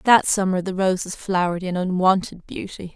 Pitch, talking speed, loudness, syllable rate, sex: 185 Hz, 160 wpm, -21 LUFS, 5.2 syllables/s, female